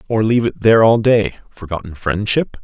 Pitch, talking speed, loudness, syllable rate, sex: 105 Hz, 180 wpm, -15 LUFS, 5.7 syllables/s, male